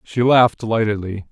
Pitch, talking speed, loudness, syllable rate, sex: 110 Hz, 135 wpm, -17 LUFS, 5.8 syllables/s, male